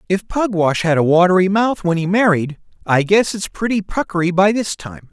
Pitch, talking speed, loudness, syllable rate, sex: 185 Hz, 200 wpm, -16 LUFS, 5.1 syllables/s, male